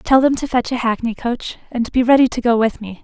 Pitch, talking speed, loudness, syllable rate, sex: 240 Hz, 275 wpm, -17 LUFS, 5.6 syllables/s, female